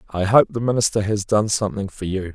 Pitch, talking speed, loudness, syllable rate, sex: 105 Hz, 230 wpm, -20 LUFS, 6.0 syllables/s, male